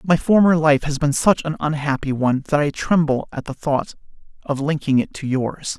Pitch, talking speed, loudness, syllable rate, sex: 150 Hz, 205 wpm, -19 LUFS, 5.1 syllables/s, male